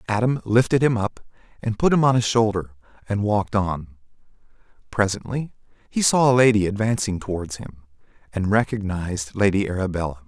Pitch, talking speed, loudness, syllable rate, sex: 105 Hz, 145 wpm, -22 LUFS, 5.7 syllables/s, male